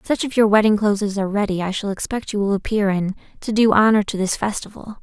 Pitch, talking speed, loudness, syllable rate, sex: 205 Hz, 250 wpm, -19 LUFS, 6.5 syllables/s, female